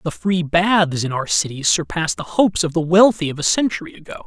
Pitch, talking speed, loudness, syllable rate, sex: 170 Hz, 225 wpm, -18 LUFS, 5.5 syllables/s, male